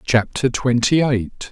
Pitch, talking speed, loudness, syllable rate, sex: 125 Hz, 120 wpm, -18 LUFS, 3.6 syllables/s, male